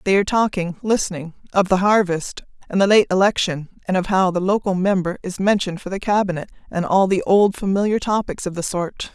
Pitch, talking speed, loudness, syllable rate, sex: 190 Hz, 190 wpm, -19 LUFS, 5.8 syllables/s, female